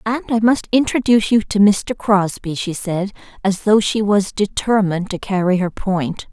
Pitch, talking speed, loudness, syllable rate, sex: 205 Hz, 180 wpm, -17 LUFS, 4.8 syllables/s, female